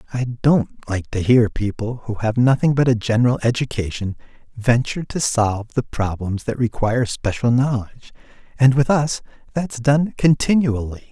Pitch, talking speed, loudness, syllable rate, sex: 120 Hz, 150 wpm, -19 LUFS, 5.1 syllables/s, male